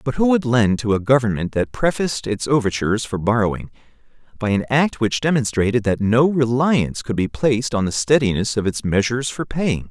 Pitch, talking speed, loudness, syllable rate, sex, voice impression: 120 Hz, 195 wpm, -19 LUFS, 5.6 syllables/s, male, very masculine, very adult-like, slightly middle-aged, very thick, very tensed, very powerful, bright, soft, clear, fluent, very cool, intellectual, sincere, calm, very mature, very friendly, very reassuring, slightly elegant, slightly wild, slightly sweet, lively, kind, slightly intense